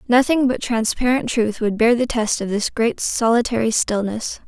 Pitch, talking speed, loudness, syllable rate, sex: 230 Hz, 175 wpm, -19 LUFS, 4.7 syllables/s, female